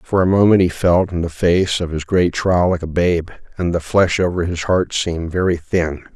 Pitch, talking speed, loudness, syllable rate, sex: 85 Hz, 235 wpm, -17 LUFS, 4.9 syllables/s, male